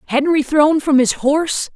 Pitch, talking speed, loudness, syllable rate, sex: 290 Hz, 170 wpm, -15 LUFS, 4.5 syllables/s, female